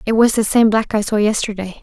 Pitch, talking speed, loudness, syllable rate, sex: 215 Hz, 265 wpm, -16 LUFS, 5.9 syllables/s, female